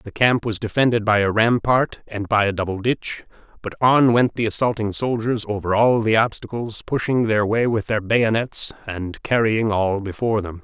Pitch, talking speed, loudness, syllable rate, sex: 110 Hz, 185 wpm, -20 LUFS, 4.8 syllables/s, male